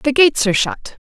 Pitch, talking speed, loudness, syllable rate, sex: 270 Hz, 225 wpm, -15 LUFS, 6.3 syllables/s, female